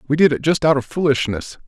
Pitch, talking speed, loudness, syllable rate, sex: 140 Hz, 250 wpm, -18 LUFS, 6.3 syllables/s, male